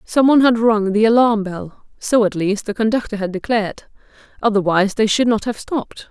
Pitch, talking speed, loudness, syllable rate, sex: 215 Hz, 185 wpm, -17 LUFS, 5.6 syllables/s, female